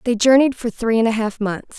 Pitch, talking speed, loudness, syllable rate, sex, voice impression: 230 Hz, 270 wpm, -18 LUFS, 5.4 syllables/s, female, very feminine, slightly young, slightly adult-like, thin, tensed, slightly weak, bright, hard, slightly muffled, fluent, slightly raspy, very cute, intellectual, very refreshing, sincere, calm, very friendly, very reassuring, very unique, wild, slightly sweet, lively, slightly strict, slightly intense